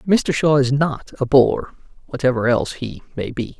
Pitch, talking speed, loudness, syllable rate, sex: 135 Hz, 185 wpm, -19 LUFS, 4.8 syllables/s, male